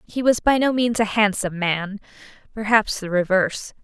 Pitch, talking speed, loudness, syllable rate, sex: 210 Hz, 155 wpm, -20 LUFS, 5.2 syllables/s, female